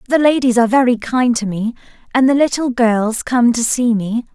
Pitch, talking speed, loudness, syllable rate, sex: 240 Hz, 205 wpm, -15 LUFS, 5.2 syllables/s, female